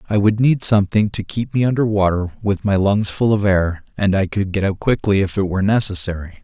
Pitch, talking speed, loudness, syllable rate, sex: 100 Hz, 235 wpm, -18 LUFS, 5.7 syllables/s, male